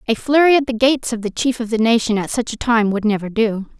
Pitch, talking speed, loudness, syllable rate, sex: 230 Hz, 285 wpm, -17 LUFS, 6.2 syllables/s, female